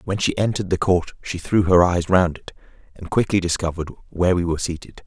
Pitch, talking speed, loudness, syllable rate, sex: 90 Hz, 215 wpm, -20 LUFS, 6.3 syllables/s, male